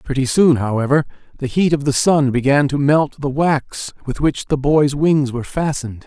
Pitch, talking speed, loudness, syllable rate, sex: 140 Hz, 200 wpm, -17 LUFS, 5.0 syllables/s, male